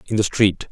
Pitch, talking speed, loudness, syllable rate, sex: 100 Hz, 255 wpm, -19 LUFS, 5.5 syllables/s, male